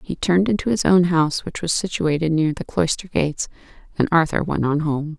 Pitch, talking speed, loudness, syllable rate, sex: 165 Hz, 210 wpm, -20 LUFS, 5.7 syllables/s, female